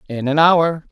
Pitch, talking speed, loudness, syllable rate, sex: 155 Hz, 200 wpm, -15 LUFS, 4.2 syllables/s, female